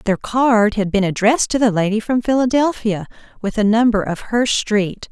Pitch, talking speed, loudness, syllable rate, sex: 220 Hz, 190 wpm, -17 LUFS, 4.9 syllables/s, female